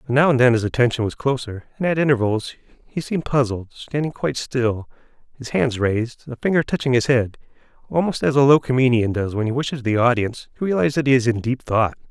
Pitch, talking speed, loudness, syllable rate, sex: 125 Hz, 220 wpm, -20 LUFS, 6.2 syllables/s, male